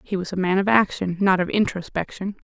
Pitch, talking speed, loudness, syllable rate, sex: 190 Hz, 220 wpm, -22 LUFS, 5.8 syllables/s, female